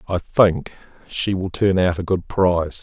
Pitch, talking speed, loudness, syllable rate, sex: 90 Hz, 190 wpm, -19 LUFS, 4.4 syllables/s, male